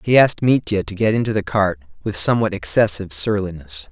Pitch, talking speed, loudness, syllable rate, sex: 100 Hz, 185 wpm, -18 LUFS, 6.2 syllables/s, male